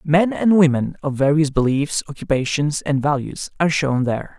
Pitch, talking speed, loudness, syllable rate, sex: 145 Hz, 165 wpm, -19 LUFS, 5.2 syllables/s, male